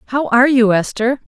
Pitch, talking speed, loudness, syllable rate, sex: 245 Hz, 180 wpm, -14 LUFS, 6.3 syllables/s, female